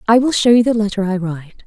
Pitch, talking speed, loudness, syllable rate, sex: 210 Hz, 290 wpm, -15 LUFS, 6.7 syllables/s, female